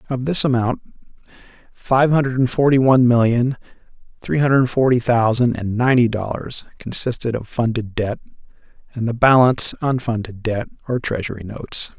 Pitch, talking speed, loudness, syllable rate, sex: 120 Hz, 130 wpm, -18 LUFS, 5.2 syllables/s, male